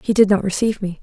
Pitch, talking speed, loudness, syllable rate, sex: 200 Hz, 290 wpm, -17 LUFS, 7.5 syllables/s, female